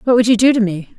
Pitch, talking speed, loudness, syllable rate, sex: 225 Hz, 365 wpm, -14 LUFS, 7.1 syllables/s, female